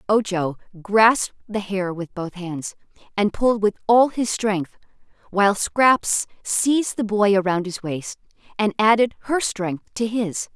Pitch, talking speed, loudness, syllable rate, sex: 205 Hz, 155 wpm, -21 LUFS, 4.2 syllables/s, female